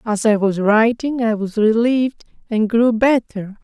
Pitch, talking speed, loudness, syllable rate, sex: 225 Hz, 165 wpm, -17 LUFS, 4.3 syllables/s, female